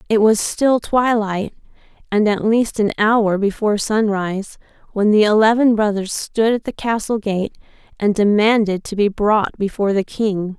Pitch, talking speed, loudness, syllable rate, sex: 210 Hz, 160 wpm, -17 LUFS, 4.6 syllables/s, female